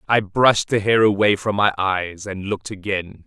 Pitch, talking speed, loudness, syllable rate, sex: 100 Hz, 200 wpm, -19 LUFS, 4.9 syllables/s, male